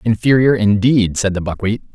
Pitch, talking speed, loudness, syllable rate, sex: 105 Hz, 155 wpm, -15 LUFS, 5.1 syllables/s, male